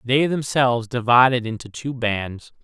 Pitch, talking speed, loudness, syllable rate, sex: 120 Hz, 135 wpm, -20 LUFS, 4.5 syllables/s, male